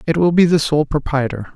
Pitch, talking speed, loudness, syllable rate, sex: 150 Hz, 230 wpm, -16 LUFS, 5.7 syllables/s, male